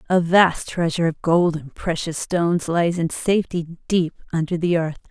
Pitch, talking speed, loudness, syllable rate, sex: 170 Hz, 175 wpm, -21 LUFS, 4.9 syllables/s, female